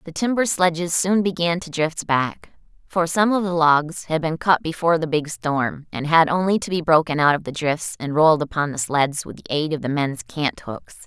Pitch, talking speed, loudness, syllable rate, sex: 160 Hz, 230 wpm, -20 LUFS, 5.1 syllables/s, female